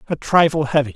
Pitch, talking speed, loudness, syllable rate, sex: 150 Hz, 190 wpm, -17 LUFS, 6.5 syllables/s, male